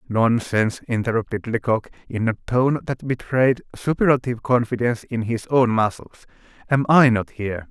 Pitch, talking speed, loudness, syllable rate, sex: 120 Hz, 140 wpm, -21 LUFS, 5.1 syllables/s, male